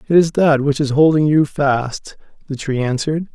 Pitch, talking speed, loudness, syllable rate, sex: 145 Hz, 195 wpm, -16 LUFS, 4.9 syllables/s, male